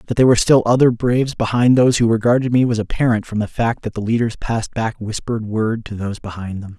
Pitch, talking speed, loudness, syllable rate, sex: 115 Hz, 240 wpm, -18 LUFS, 6.5 syllables/s, male